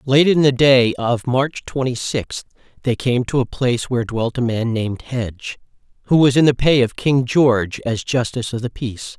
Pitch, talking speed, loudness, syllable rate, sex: 125 Hz, 210 wpm, -18 LUFS, 5.1 syllables/s, male